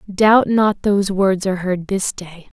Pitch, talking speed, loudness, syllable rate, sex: 190 Hz, 185 wpm, -17 LUFS, 4.3 syllables/s, female